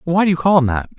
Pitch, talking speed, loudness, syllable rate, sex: 160 Hz, 365 wpm, -15 LUFS, 7.5 syllables/s, male